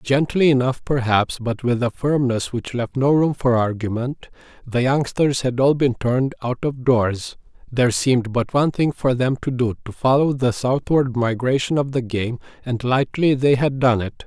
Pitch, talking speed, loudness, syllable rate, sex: 130 Hz, 185 wpm, -20 LUFS, 4.7 syllables/s, male